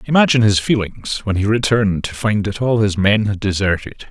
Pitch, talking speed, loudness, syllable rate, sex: 105 Hz, 205 wpm, -17 LUFS, 5.6 syllables/s, male